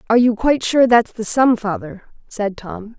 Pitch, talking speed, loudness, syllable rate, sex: 225 Hz, 200 wpm, -17 LUFS, 4.9 syllables/s, female